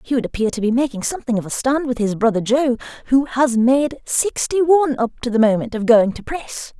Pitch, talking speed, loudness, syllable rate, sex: 250 Hz, 240 wpm, -18 LUFS, 5.6 syllables/s, female